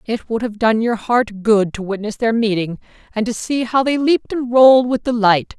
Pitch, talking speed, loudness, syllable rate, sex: 225 Hz, 225 wpm, -17 LUFS, 5.1 syllables/s, male